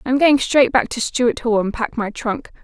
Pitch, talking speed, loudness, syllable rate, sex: 240 Hz, 250 wpm, -18 LUFS, 4.6 syllables/s, female